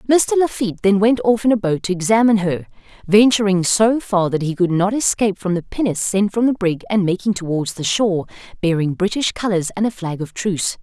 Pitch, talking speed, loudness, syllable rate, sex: 200 Hz, 215 wpm, -18 LUFS, 5.9 syllables/s, female